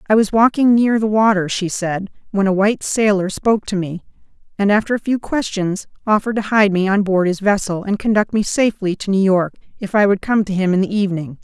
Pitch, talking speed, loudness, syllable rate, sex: 200 Hz, 230 wpm, -17 LUFS, 5.9 syllables/s, female